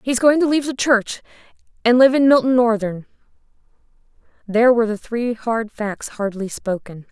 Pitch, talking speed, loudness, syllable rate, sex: 235 Hz, 160 wpm, -18 LUFS, 5.2 syllables/s, female